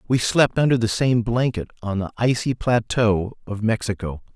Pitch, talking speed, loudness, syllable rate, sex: 115 Hz, 165 wpm, -21 LUFS, 4.7 syllables/s, male